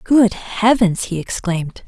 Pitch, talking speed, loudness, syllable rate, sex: 200 Hz, 130 wpm, -17 LUFS, 3.9 syllables/s, female